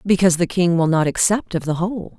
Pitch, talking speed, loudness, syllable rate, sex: 175 Hz, 245 wpm, -18 LUFS, 6.2 syllables/s, female